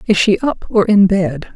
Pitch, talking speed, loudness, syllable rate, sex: 195 Hz, 230 wpm, -14 LUFS, 4.6 syllables/s, female